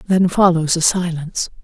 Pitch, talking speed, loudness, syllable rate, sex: 170 Hz, 145 wpm, -16 LUFS, 5.0 syllables/s, female